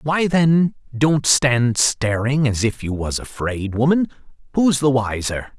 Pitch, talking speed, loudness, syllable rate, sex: 130 Hz, 150 wpm, -19 LUFS, 3.7 syllables/s, male